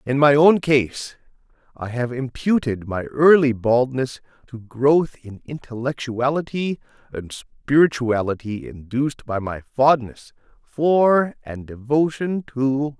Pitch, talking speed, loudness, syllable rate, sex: 130 Hz, 115 wpm, -20 LUFS, 3.9 syllables/s, male